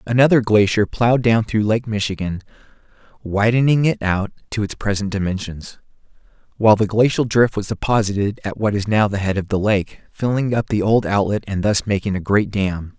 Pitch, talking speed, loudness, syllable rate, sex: 105 Hz, 185 wpm, -18 LUFS, 5.4 syllables/s, male